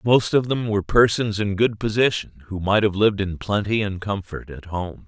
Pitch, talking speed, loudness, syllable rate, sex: 105 Hz, 215 wpm, -21 LUFS, 5.0 syllables/s, male